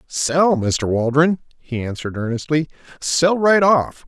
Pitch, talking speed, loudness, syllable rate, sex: 145 Hz, 135 wpm, -18 LUFS, 4.1 syllables/s, male